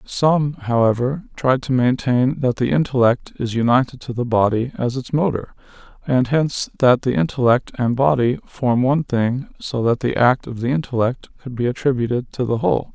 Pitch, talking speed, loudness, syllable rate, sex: 125 Hz, 180 wpm, -19 LUFS, 5.1 syllables/s, male